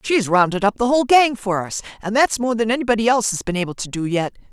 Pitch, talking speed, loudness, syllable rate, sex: 220 Hz, 265 wpm, -19 LUFS, 6.7 syllables/s, female